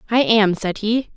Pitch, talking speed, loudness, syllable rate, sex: 210 Hz, 205 wpm, -18 LUFS, 4.4 syllables/s, female